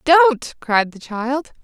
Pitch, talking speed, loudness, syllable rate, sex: 270 Hz, 145 wpm, -18 LUFS, 2.9 syllables/s, female